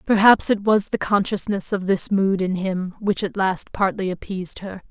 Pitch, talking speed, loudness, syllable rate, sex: 195 Hz, 195 wpm, -21 LUFS, 4.7 syllables/s, female